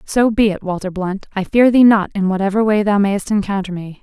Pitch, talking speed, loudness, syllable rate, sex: 200 Hz, 240 wpm, -16 LUFS, 5.5 syllables/s, female